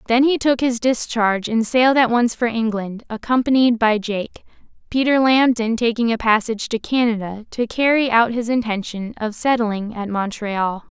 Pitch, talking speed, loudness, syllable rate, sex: 230 Hz, 165 wpm, -19 LUFS, 4.9 syllables/s, female